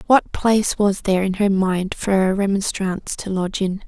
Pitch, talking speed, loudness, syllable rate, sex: 195 Hz, 200 wpm, -20 LUFS, 5.2 syllables/s, female